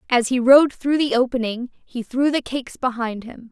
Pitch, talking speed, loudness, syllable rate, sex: 250 Hz, 205 wpm, -19 LUFS, 5.1 syllables/s, female